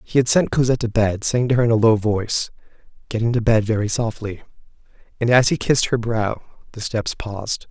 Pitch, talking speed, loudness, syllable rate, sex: 115 Hz, 210 wpm, -20 LUFS, 5.9 syllables/s, male